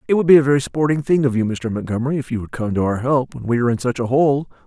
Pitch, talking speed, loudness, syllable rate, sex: 130 Hz, 320 wpm, -18 LUFS, 7.1 syllables/s, male